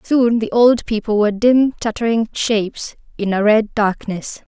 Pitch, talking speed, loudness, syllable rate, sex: 225 Hz, 160 wpm, -17 LUFS, 4.5 syllables/s, female